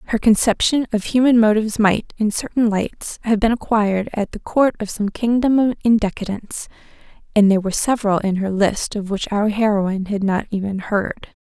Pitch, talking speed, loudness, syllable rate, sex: 210 Hz, 185 wpm, -18 LUFS, 5.3 syllables/s, female